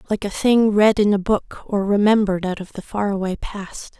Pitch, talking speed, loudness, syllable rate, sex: 205 Hz, 210 wpm, -19 LUFS, 5.2 syllables/s, female